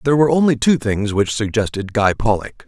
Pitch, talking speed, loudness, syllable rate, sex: 120 Hz, 200 wpm, -17 LUFS, 5.9 syllables/s, male